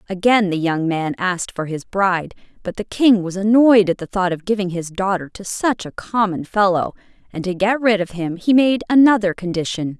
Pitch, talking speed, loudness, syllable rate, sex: 195 Hz, 210 wpm, -18 LUFS, 5.2 syllables/s, female